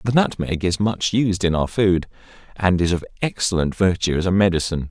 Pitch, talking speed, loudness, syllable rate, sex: 95 Hz, 195 wpm, -20 LUFS, 5.6 syllables/s, male